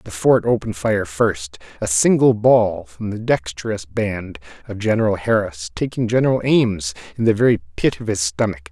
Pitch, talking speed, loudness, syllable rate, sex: 115 Hz, 165 wpm, -19 LUFS, 4.8 syllables/s, male